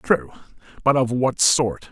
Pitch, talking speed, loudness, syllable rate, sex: 125 Hz, 155 wpm, -20 LUFS, 3.6 syllables/s, male